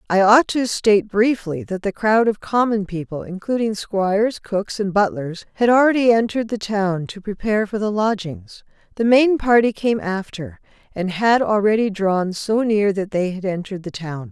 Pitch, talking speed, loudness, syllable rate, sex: 205 Hz, 180 wpm, -19 LUFS, 4.8 syllables/s, female